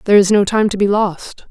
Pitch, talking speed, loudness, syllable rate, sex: 200 Hz, 280 wpm, -14 LUFS, 6.1 syllables/s, female